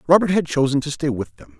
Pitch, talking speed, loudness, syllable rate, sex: 145 Hz, 265 wpm, -20 LUFS, 6.3 syllables/s, male